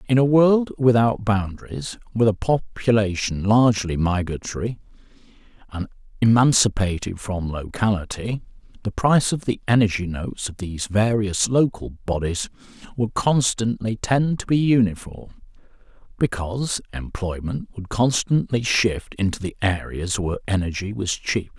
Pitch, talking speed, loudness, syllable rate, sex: 105 Hz, 120 wpm, -22 LUFS, 4.7 syllables/s, male